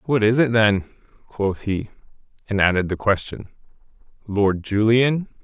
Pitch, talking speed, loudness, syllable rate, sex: 110 Hz, 135 wpm, -20 LUFS, 4.2 syllables/s, male